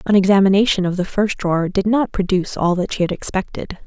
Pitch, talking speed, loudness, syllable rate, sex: 195 Hz, 220 wpm, -18 LUFS, 6.2 syllables/s, female